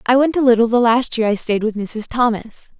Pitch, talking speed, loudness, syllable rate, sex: 235 Hz, 255 wpm, -17 LUFS, 5.5 syllables/s, female